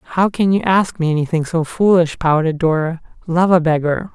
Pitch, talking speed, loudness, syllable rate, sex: 170 Hz, 190 wpm, -16 LUFS, 5.3 syllables/s, male